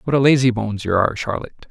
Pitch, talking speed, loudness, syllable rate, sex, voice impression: 120 Hz, 210 wpm, -18 LUFS, 7.8 syllables/s, male, masculine, adult-like, slightly relaxed, slightly weak, muffled, raspy, calm, mature, slightly reassuring, wild, modest